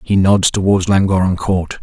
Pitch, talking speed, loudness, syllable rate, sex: 95 Hz, 165 wpm, -14 LUFS, 4.7 syllables/s, male